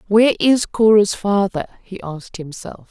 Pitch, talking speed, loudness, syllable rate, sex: 200 Hz, 145 wpm, -16 LUFS, 4.8 syllables/s, female